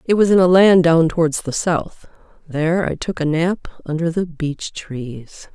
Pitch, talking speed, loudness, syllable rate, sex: 165 Hz, 185 wpm, -17 LUFS, 4.3 syllables/s, female